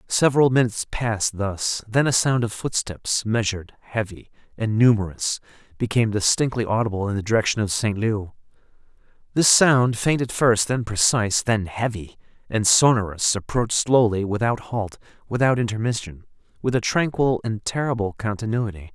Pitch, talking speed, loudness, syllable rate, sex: 110 Hz, 145 wpm, -21 LUFS, 5.2 syllables/s, male